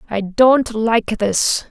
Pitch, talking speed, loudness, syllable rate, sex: 225 Hz, 140 wpm, -16 LUFS, 2.7 syllables/s, female